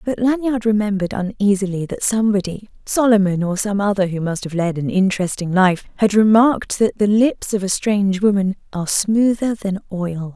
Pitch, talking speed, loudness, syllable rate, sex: 205 Hz, 160 wpm, -18 LUFS, 5.4 syllables/s, female